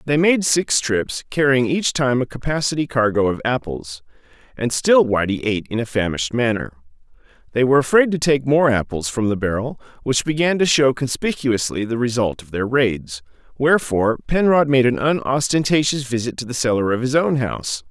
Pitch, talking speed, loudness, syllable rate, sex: 125 Hz, 180 wpm, -19 LUFS, 5.4 syllables/s, male